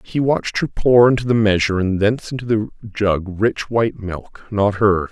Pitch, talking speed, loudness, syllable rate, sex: 105 Hz, 200 wpm, -18 LUFS, 5.0 syllables/s, male